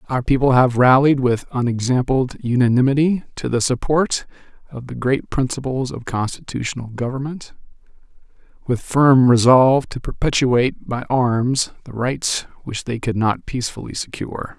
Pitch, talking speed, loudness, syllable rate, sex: 130 Hz, 130 wpm, -19 LUFS, 4.9 syllables/s, male